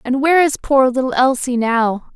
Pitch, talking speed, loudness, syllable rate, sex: 260 Hz, 195 wpm, -15 LUFS, 4.9 syllables/s, female